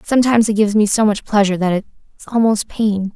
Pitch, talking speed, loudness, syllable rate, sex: 210 Hz, 230 wpm, -16 LUFS, 7.0 syllables/s, female